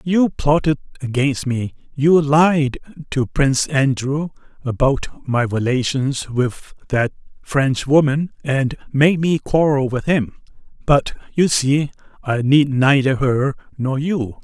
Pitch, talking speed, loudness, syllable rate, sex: 140 Hz, 125 wpm, -18 LUFS, 3.6 syllables/s, male